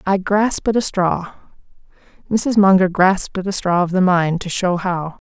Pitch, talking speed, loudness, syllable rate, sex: 185 Hz, 195 wpm, -17 LUFS, 4.6 syllables/s, female